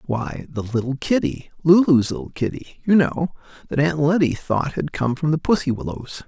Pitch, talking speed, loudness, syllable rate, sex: 145 Hz, 180 wpm, -21 LUFS, 5.0 syllables/s, male